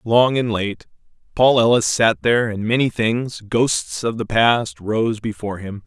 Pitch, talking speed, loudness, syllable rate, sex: 110 Hz, 175 wpm, -18 LUFS, 4.2 syllables/s, male